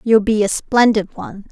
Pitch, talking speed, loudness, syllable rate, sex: 215 Hz, 200 wpm, -15 LUFS, 5.0 syllables/s, female